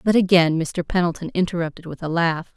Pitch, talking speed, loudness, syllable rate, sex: 170 Hz, 190 wpm, -21 LUFS, 5.8 syllables/s, female